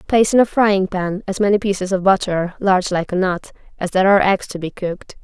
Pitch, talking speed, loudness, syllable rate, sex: 190 Hz, 240 wpm, -17 LUFS, 6.2 syllables/s, female